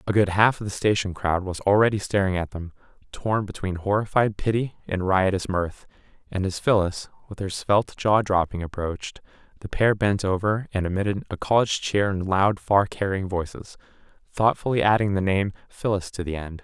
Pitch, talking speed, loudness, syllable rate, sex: 100 Hz, 180 wpm, -24 LUFS, 5.3 syllables/s, male